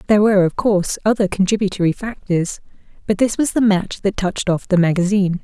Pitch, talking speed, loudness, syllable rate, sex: 195 Hz, 190 wpm, -18 LUFS, 6.4 syllables/s, female